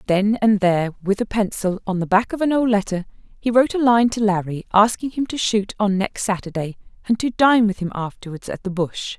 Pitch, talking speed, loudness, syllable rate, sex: 205 Hz, 230 wpm, -20 LUFS, 5.5 syllables/s, female